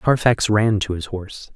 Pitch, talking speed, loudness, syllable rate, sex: 100 Hz, 195 wpm, -20 LUFS, 4.6 syllables/s, male